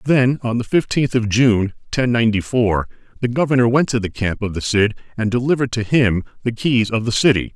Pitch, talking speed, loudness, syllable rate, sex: 115 Hz, 215 wpm, -18 LUFS, 5.6 syllables/s, male